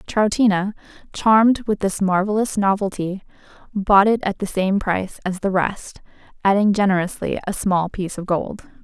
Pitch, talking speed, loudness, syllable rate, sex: 200 Hz, 150 wpm, -20 LUFS, 4.8 syllables/s, female